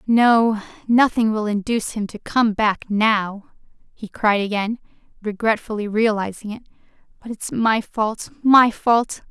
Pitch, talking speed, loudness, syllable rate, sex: 215 Hz, 135 wpm, -19 LUFS, 4.2 syllables/s, female